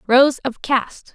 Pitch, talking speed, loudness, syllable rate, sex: 260 Hz, 160 wpm, -18 LUFS, 3.1 syllables/s, female